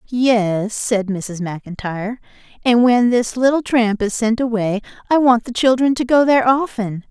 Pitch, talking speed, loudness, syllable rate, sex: 230 Hz, 170 wpm, -17 LUFS, 4.3 syllables/s, female